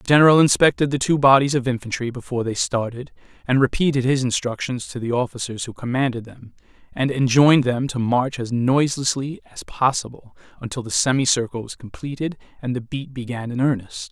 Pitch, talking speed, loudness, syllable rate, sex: 130 Hz, 175 wpm, -20 LUFS, 5.8 syllables/s, male